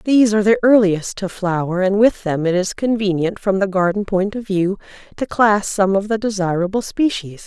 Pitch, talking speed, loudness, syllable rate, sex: 200 Hz, 200 wpm, -17 LUFS, 5.2 syllables/s, female